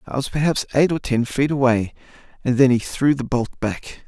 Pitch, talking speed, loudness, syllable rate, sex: 130 Hz, 205 wpm, -20 LUFS, 5.1 syllables/s, male